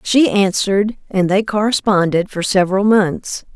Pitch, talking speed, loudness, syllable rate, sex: 200 Hz, 135 wpm, -15 LUFS, 4.6 syllables/s, female